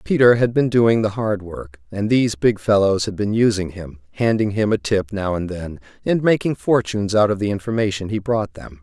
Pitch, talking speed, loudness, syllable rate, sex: 105 Hz, 220 wpm, -19 LUFS, 5.3 syllables/s, male